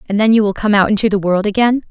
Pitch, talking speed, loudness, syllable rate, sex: 205 Hz, 315 wpm, -14 LUFS, 6.7 syllables/s, female